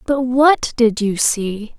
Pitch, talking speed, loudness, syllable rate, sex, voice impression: 240 Hz, 170 wpm, -16 LUFS, 3.1 syllables/s, female, feminine, slightly adult-like, tensed, slightly bright, clear, slightly cute, slightly refreshing, friendly